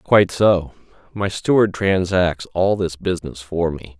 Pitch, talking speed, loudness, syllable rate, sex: 90 Hz, 150 wpm, -19 LUFS, 4.3 syllables/s, male